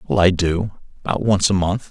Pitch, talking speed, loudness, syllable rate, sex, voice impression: 95 Hz, 220 wpm, -19 LUFS, 4.8 syllables/s, male, masculine, adult-like, slightly thick, cool, sincere, calm, slightly elegant, slightly wild